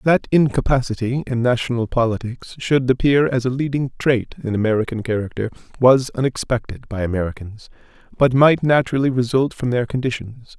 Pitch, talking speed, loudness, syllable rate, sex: 125 Hz, 140 wpm, -19 LUFS, 5.5 syllables/s, male